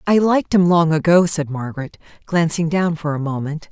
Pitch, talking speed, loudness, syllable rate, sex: 165 Hz, 195 wpm, -18 LUFS, 5.5 syllables/s, female